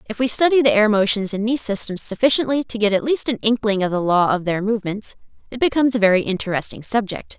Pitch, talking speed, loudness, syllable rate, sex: 215 Hz, 225 wpm, -19 LUFS, 6.5 syllables/s, female